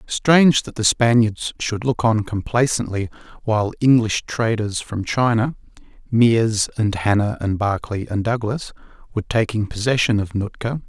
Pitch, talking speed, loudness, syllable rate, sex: 110 Hz, 125 wpm, -19 LUFS, 4.7 syllables/s, male